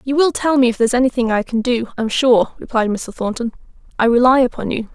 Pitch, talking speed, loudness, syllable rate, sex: 240 Hz, 245 wpm, -17 LUFS, 6.1 syllables/s, female